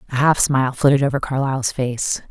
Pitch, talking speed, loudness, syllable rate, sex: 135 Hz, 185 wpm, -18 LUFS, 6.0 syllables/s, female